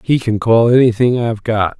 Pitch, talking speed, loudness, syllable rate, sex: 115 Hz, 200 wpm, -14 LUFS, 5.3 syllables/s, male